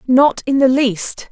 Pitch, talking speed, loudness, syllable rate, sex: 260 Hz, 185 wpm, -15 LUFS, 3.6 syllables/s, female